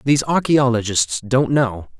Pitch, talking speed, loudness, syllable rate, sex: 130 Hz, 120 wpm, -18 LUFS, 4.5 syllables/s, male